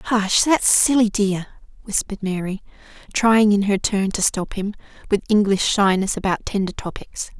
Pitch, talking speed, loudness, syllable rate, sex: 205 Hz, 155 wpm, -19 LUFS, 4.7 syllables/s, female